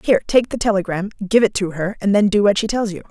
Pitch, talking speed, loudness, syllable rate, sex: 205 Hz, 290 wpm, -18 LUFS, 6.7 syllables/s, female